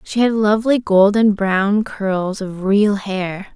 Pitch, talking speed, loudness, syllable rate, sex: 205 Hz, 150 wpm, -17 LUFS, 3.5 syllables/s, female